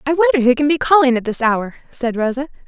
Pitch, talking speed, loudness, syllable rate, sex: 265 Hz, 245 wpm, -16 LUFS, 6.3 syllables/s, female